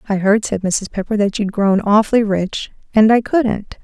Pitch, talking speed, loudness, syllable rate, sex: 210 Hz, 205 wpm, -16 LUFS, 4.7 syllables/s, female